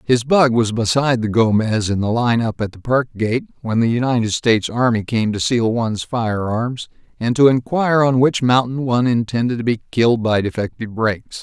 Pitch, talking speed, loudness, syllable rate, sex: 120 Hz, 195 wpm, -18 LUFS, 5.4 syllables/s, male